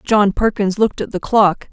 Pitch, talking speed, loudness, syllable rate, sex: 205 Hz, 210 wpm, -16 LUFS, 5.0 syllables/s, female